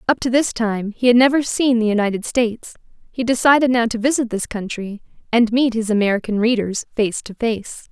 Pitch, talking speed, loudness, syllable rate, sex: 230 Hz, 195 wpm, -18 LUFS, 5.4 syllables/s, female